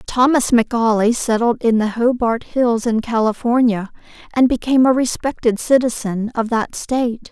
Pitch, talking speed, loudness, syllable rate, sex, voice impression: 235 Hz, 140 wpm, -17 LUFS, 4.9 syllables/s, female, very feminine, very young, very thin, tensed, slightly weak, very bright, slightly soft, very clear, very fluent, very cute, intellectual, very refreshing, very sincere, calm, very mature, very friendly, very reassuring, very unique, elegant, slightly wild, very sweet, slightly lively, very kind, slightly sharp, modest, light